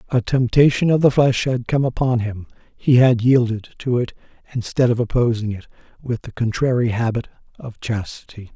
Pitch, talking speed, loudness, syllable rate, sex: 120 Hz, 170 wpm, -19 LUFS, 5.1 syllables/s, male